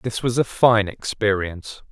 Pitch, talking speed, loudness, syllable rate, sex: 110 Hz, 155 wpm, -20 LUFS, 4.4 syllables/s, male